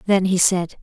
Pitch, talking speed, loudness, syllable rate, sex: 185 Hz, 215 wpm, -18 LUFS, 4.8 syllables/s, female